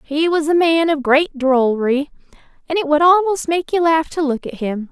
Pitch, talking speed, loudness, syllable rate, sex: 300 Hz, 220 wpm, -16 LUFS, 5.0 syllables/s, female